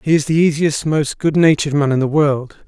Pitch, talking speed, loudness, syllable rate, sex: 150 Hz, 225 wpm, -16 LUFS, 5.5 syllables/s, male